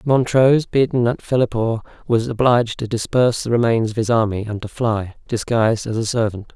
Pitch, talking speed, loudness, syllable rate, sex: 115 Hz, 185 wpm, -19 LUFS, 5.6 syllables/s, male